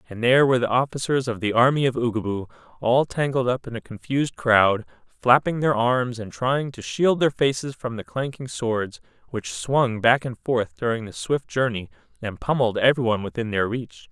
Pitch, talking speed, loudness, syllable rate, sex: 120 Hz, 190 wpm, -23 LUFS, 5.2 syllables/s, male